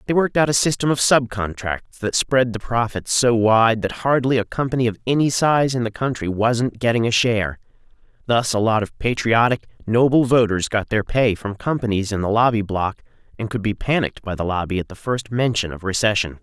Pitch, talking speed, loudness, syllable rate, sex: 115 Hz, 205 wpm, -20 LUFS, 5.5 syllables/s, male